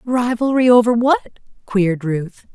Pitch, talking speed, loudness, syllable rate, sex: 230 Hz, 120 wpm, -16 LUFS, 4.2 syllables/s, female